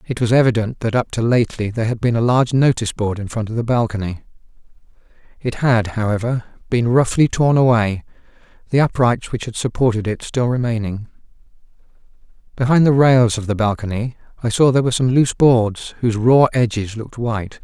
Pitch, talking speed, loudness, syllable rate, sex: 120 Hz, 175 wpm, -17 LUFS, 6.0 syllables/s, male